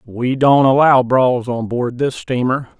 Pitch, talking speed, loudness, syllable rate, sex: 125 Hz, 170 wpm, -15 LUFS, 3.9 syllables/s, male